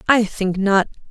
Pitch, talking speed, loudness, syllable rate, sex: 205 Hz, 160 wpm, -18 LUFS, 4.1 syllables/s, female